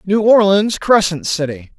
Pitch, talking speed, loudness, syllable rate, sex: 190 Hz, 135 wpm, -14 LUFS, 4.3 syllables/s, male